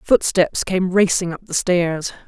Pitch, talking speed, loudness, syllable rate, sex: 180 Hz, 160 wpm, -18 LUFS, 3.9 syllables/s, female